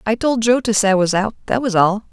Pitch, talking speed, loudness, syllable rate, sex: 215 Hz, 310 wpm, -17 LUFS, 6.1 syllables/s, female